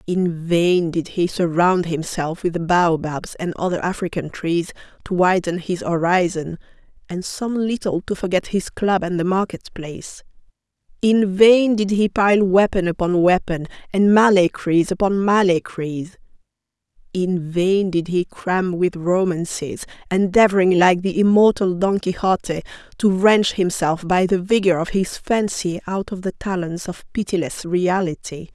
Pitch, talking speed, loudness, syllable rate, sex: 185 Hz, 145 wpm, -19 LUFS, 4.4 syllables/s, female